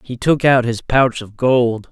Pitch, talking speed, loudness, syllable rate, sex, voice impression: 120 Hz, 220 wpm, -16 LUFS, 3.9 syllables/s, male, very masculine, very adult-like, thick, slightly tensed, slightly weak, slightly dark, soft, clear, fluent, slightly cool, intellectual, refreshing, slightly sincere, calm, slightly mature, slightly friendly, slightly reassuring, unique, elegant, slightly wild, slightly sweet, lively, slightly kind, slightly intense, modest